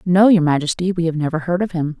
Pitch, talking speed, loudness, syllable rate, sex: 170 Hz, 270 wpm, -17 LUFS, 6.4 syllables/s, female